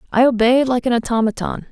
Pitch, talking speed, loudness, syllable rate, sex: 240 Hz, 175 wpm, -17 LUFS, 6.2 syllables/s, female